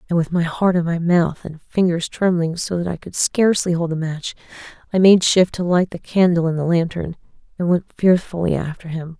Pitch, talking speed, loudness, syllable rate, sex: 170 Hz, 215 wpm, -19 LUFS, 5.3 syllables/s, female